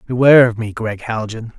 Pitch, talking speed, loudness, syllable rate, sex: 115 Hz, 190 wpm, -15 LUFS, 5.7 syllables/s, male